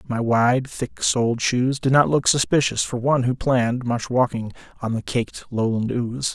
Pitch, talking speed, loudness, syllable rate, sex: 125 Hz, 190 wpm, -21 LUFS, 5.0 syllables/s, male